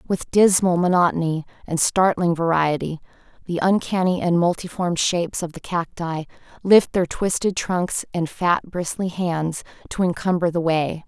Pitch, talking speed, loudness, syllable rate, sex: 175 Hz, 140 wpm, -21 LUFS, 4.5 syllables/s, female